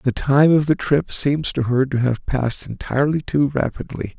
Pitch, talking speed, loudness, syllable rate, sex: 135 Hz, 200 wpm, -19 LUFS, 4.8 syllables/s, male